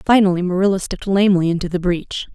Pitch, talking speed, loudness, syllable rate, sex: 185 Hz, 180 wpm, -18 LUFS, 6.9 syllables/s, female